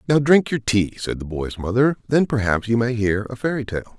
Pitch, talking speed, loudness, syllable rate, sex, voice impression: 115 Hz, 240 wpm, -20 LUFS, 5.4 syllables/s, male, masculine, middle-aged, tensed, slightly weak, hard, muffled, raspy, cool, calm, mature, wild, lively, slightly strict